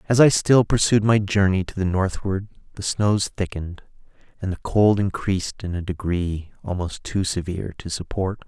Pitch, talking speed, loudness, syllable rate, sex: 95 Hz, 170 wpm, -22 LUFS, 5.0 syllables/s, male